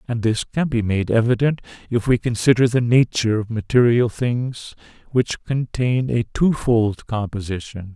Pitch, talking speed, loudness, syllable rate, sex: 115 Hz, 145 wpm, -20 LUFS, 4.5 syllables/s, male